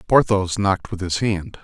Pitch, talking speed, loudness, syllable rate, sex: 95 Hz, 185 wpm, -20 LUFS, 4.8 syllables/s, male